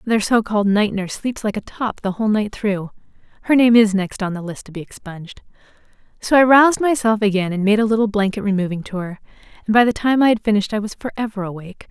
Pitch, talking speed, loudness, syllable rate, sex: 210 Hz, 225 wpm, -18 LUFS, 5.6 syllables/s, female